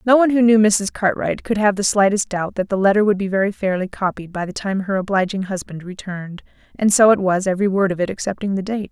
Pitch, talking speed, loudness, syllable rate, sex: 195 Hz, 250 wpm, -18 LUFS, 6.3 syllables/s, female